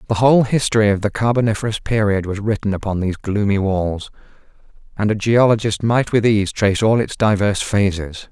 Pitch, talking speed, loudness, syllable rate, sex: 105 Hz, 175 wpm, -17 LUFS, 5.8 syllables/s, male